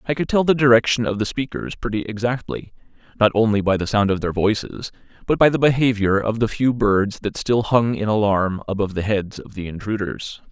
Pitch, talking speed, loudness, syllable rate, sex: 110 Hz, 210 wpm, -20 LUFS, 5.5 syllables/s, male